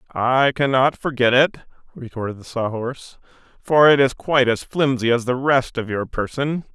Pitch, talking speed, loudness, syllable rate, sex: 130 Hz, 180 wpm, -19 LUFS, 4.9 syllables/s, male